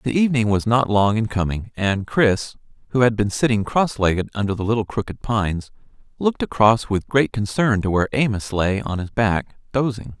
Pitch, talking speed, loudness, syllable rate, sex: 110 Hz, 195 wpm, -20 LUFS, 5.3 syllables/s, male